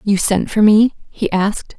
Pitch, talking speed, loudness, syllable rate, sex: 205 Hz, 200 wpm, -15 LUFS, 4.6 syllables/s, female